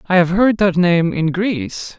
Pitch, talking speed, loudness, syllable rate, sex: 180 Hz, 210 wpm, -16 LUFS, 4.3 syllables/s, male